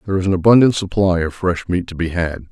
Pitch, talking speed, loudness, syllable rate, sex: 90 Hz, 260 wpm, -17 LUFS, 6.6 syllables/s, male